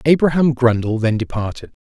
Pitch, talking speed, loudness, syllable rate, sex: 125 Hz, 130 wpm, -17 LUFS, 5.6 syllables/s, male